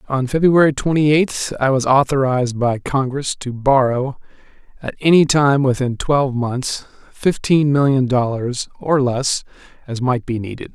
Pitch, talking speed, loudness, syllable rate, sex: 135 Hz, 145 wpm, -17 LUFS, 4.5 syllables/s, male